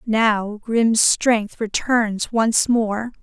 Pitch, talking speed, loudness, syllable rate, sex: 220 Hz, 110 wpm, -19 LUFS, 2.3 syllables/s, female